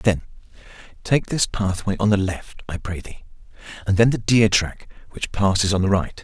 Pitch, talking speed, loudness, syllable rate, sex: 100 Hz, 190 wpm, -21 LUFS, 4.9 syllables/s, male